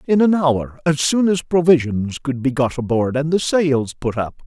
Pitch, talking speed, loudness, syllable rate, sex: 145 Hz, 215 wpm, -18 LUFS, 4.7 syllables/s, male